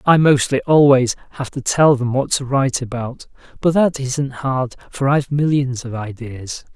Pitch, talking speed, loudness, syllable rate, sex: 135 Hz, 180 wpm, -17 LUFS, 4.6 syllables/s, male